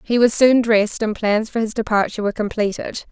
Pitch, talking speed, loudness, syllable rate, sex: 220 Hz, 210 wpm, -18 LUFS, 6.0 syllables/s, female